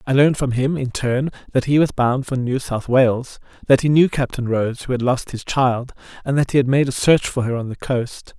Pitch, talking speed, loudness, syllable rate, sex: 130 Hz, 260 wpm, -19 LUFS, 5.1 syllables/s, male